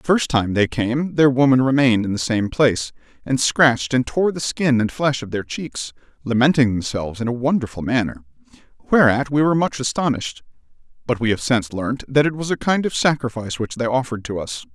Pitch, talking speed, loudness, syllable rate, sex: 125 Hz, 210 wpm, -19 LUFS, 5.8 syllables/s, male